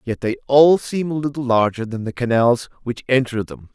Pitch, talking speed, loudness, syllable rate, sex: 125 Hz, 210 wpm, -19 LUFS, 5.2 syllables/s, male